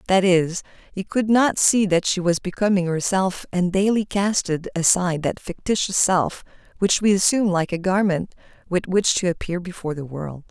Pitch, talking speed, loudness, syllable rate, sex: 185 Hz, 175 wpm, -21 LUFS, 5.0 syllables/s, female